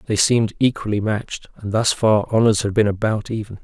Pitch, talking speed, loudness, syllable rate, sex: 105 Hz, 200 wpm, -19 LUFS, 5.8 syllables/s, male